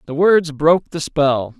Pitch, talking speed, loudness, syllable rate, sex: 150 Hz, 190 wpm, -16 LUFS, 4.3 syllables/s, male